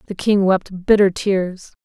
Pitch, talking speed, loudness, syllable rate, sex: 190 Hz, 165 wpm, -17 LUFS, 3.8 syllables/s, female